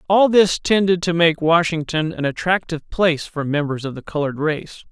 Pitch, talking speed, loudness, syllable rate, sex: 165 Hz, 185 wpm, -19 LUFS, 5.5 syllables/s, male